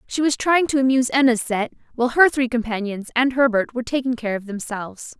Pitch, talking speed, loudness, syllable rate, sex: 245 Hz, 210 wpm, -20 LUFS, 6.1 syllables/s, female